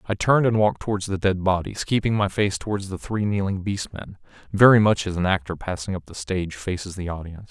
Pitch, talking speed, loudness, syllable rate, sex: 95 Hz, 230 wpm, -23 LUFS, 6.1 syllables/s, male